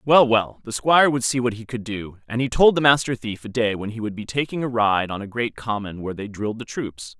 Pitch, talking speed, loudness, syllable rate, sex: 115 Hz, 285 wpm, -22 LUFS, 5.7 syllables/s, male